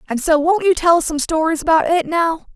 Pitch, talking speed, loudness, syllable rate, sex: 330 Hz, 260 wpm, -16 LUFS, 5.7 syllables/s, female